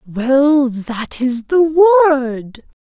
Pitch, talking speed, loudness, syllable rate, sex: 275 Hz, 105 wpm, -14 LUFS, 2.9 syllables/s, female